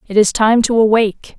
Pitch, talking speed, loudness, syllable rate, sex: 220 Hz, 215 wpm, -13 LUFS, 5.6 syllables/s, female